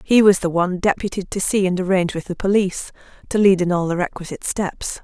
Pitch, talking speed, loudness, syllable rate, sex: 185 Hz, 215 wpm, -19 LUFS, 6.4 syllables/s, female